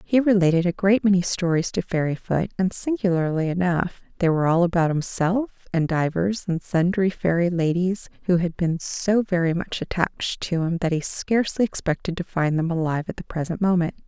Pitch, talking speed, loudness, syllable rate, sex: 175 Hz, 185 wpm, -23 LUFS, 5.4 syllables/s, female